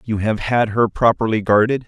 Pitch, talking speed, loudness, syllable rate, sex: 110 Hz, 190 wpm, -17 LUFS, 5.1 syllables/s, male